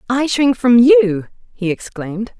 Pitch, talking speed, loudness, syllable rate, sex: 225 Hz, 150 wpm, -15 LUFS, 4.1 syllables/s, female